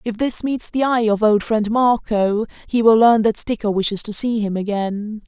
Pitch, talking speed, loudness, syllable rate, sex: 220 Hz, 215 wpm, -18 LUFS, 4.7 syllables/s, female